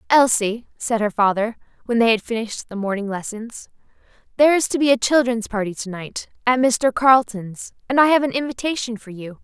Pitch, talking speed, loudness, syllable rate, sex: 230 Hz, 190 wpm, -19 LUFS, 5.6 syllables/s, female